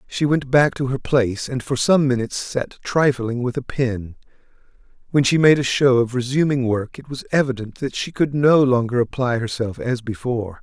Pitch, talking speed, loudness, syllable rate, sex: 130 Hz, 200 wpm, -20 LUFS, 5.1 syllables/s, male